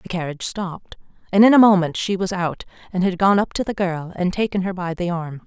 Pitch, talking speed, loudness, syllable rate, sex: 185 Hz, 255 wpm, -20 LUFS, 5.9 syllables/s, female